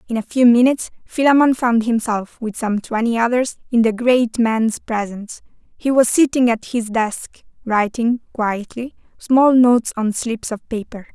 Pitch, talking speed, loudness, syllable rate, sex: 235 Hz, 160 wpm, -17 LUFS, 4.6 syllables/s, female